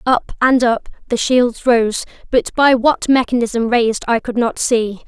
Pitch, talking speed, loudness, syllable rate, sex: 240 Hz, 175 wpm, -16 LUFS, 4.2 syllables/s, female